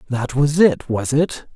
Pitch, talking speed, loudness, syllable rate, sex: 135 Hz, 195 wpm, -18 LUFS, 3.8 syllables/s, male